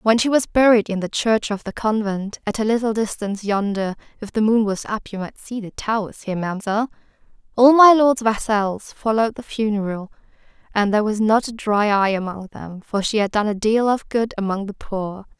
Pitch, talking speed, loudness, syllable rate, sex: 215 Hz, 210 wpm, -20 LUFS, 5.4 syllables/s, female